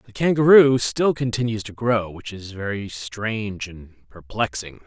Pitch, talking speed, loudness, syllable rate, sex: 110 Hz, 150 wpm, -21 LUFS, 4.5 syllables/s, male